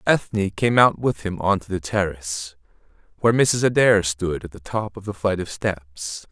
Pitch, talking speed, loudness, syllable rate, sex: 95 Hz, 200 wpm, -21 LUFS, 4.7 syllables/s, male